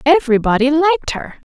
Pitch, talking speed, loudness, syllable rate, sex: 290 Hz, 115 wpm, -15 LUFS, 6.0 syllables/s, female